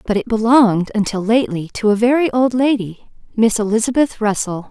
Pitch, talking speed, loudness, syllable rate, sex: 225 Hz, 165 wpm, -16 LUFS, 5.6 syllables/s, female